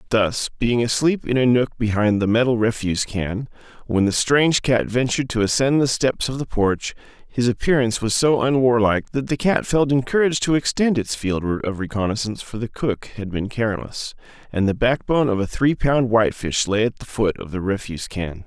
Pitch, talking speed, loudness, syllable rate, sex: 120 Hz, 200 wpm, -20 LUFS, 5.4 syllables/s, male